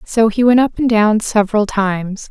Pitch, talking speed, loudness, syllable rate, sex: 215 Hz, 210 wpm, -14 LUFS, 5.0 syllables/s, female